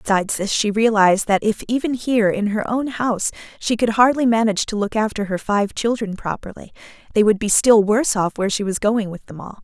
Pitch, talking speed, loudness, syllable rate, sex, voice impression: 215 Hz, 225 wpm, -19 LUFS, 5.9 syllables/s, female, very feminine, young, very thin, very tensed, slightly powerful, very bright, hard, very clear, very fluent, cute, slightly intellectual, slightly refreshing, sincere, calm, friendly, reassuring, unique, elegant, slightly wild, slightly sweet, lively, strict, intense